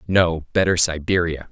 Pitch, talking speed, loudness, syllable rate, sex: 85 Hz, 120 wpm, -19 LUFS, 4.7 syllables/s, male